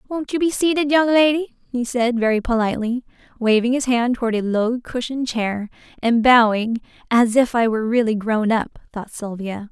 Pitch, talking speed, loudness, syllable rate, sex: 240 Hz, 180 wpm, -19 LUFS, 5.2 syllables/s, female